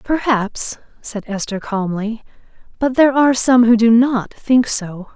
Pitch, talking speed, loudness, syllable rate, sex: 230 Hz, 150 wpm, -16 LUFS, 4.2 syllables/s, female